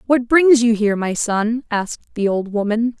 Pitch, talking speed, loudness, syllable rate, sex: 225 Hz, 200 wpm, -17 LUFS, 4.9 syllables/s, female